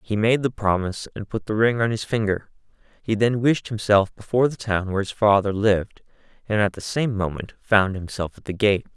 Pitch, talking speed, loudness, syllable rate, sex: 105 Hz, 215 wpm, -22 LUFS, 5.5 syllables/s, male